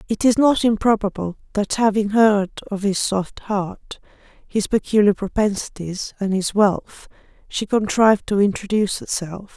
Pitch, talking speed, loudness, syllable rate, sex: 205 Hz, 140 wpm, -20 LUFS, 4.5 syllables/s, female